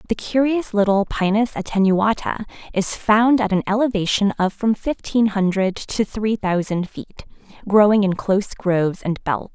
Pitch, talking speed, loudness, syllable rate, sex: 205 Hz, 150 wpm, -19 LUFS, 4.5 syllables/s, female